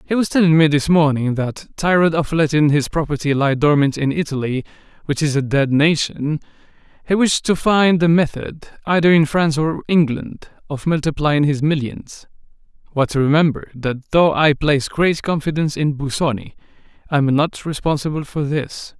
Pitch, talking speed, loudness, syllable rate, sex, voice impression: 150 Hz, 165 wpm, -17 LUFS, 5.0 syllables/s, male, very masculine, adult-like, slightly middle-aged, slightly thick, tensed, slightly weak, very bright, very hard, slightly clear, fluent, slightly raspy, slightly cool, very intellectual, refreshing, very sincere, slightly calm, slightly mature, friendly, reassuring, very unique, elegant, slightly wild, slightly sweet, lively, kind, slightly intense, slightly sharp